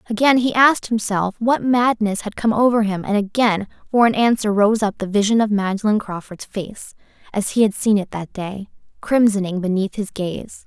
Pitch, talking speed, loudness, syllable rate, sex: 210 Hz, 190 wpm, -19 LUFS, 5.0 syllables/s, female